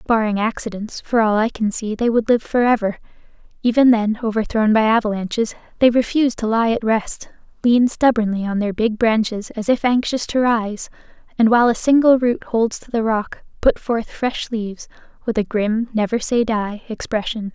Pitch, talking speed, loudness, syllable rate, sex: 225 Hz, 180 wpm, -18 LUFS, 5.1 syllables/s, female